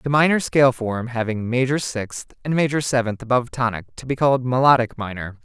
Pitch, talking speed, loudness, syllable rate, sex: 125 Hz, 190 wpm, -20 LUFS, 5.9 syllables/s, male